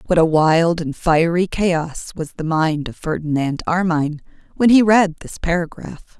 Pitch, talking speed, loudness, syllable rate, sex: 165 Hz, 165 wpm, -18 LUFS, 4.3 syllables/s, female